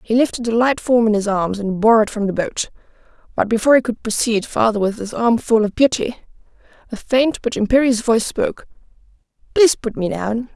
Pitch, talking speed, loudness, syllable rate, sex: 225 Hz, 200 wpm, -17 LUFS, 5.7 syllables/s, female